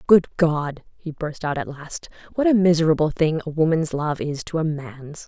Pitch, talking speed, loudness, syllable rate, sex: 160 Hz, 205 wpm, -22 LUFS, 4.7 syllables/s, female